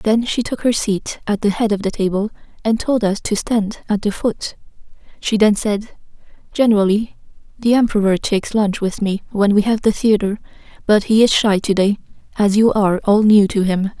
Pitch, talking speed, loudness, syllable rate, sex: 210 Hz, 200 wpm, -17 LUFS, 5.1 syllables/s, female